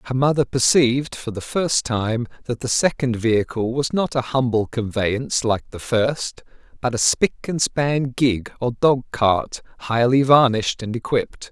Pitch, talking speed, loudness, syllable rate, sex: 125 Hz, 165 wpm, -20 LUFS, 4.5 syllables/s, male